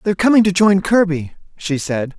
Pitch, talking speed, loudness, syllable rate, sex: 180 Hz, 195 wpm, -15 LUFS, 5.6 syllables/s, male